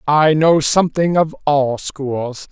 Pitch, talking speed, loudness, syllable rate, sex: 150 Hz, 145 wpm, -16 LUFS, 3.5 syllables/s, male